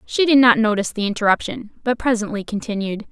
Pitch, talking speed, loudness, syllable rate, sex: 220 Hz, 175 wpm, -19 LUFS, 6.1 syllables/s, female